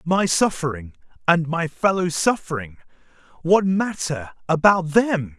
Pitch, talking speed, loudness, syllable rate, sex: 165 Hz, 100 wpm, -21 LUFS, 4.1 syllables/s, male